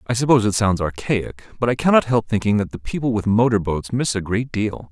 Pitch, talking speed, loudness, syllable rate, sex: 110 Hz, 245 wpm, -20 LUFS, 5.8 syllables/s, male